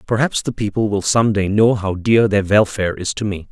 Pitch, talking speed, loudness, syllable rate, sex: 105 Hz, 240 wpm, -17 LUFS, 5.4 syllables/s, male